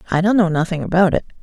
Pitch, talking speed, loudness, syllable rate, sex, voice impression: 175 Hz, 255 wpm, -17 LUFS, 7.6 syllables/s, female, very feminine, adult-like, slightly muffled, slightly fluent, sincere, slightly calm, elegant, slightly sweet